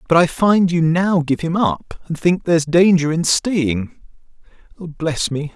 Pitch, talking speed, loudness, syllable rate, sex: 165 Hz, 175 wpm, -17 LUFS, 4.2 syllables/s, male